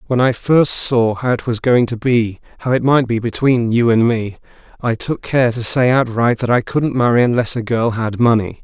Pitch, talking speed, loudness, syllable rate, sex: 120 Hz, 215 wpm, -15 LUFS, 4.9 syllables/s, male